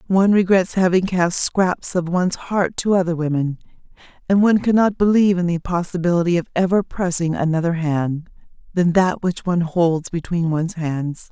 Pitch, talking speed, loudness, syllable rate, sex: 175 Hz, 170 wpm, -19 LUFS, 5.2 syllables/s, female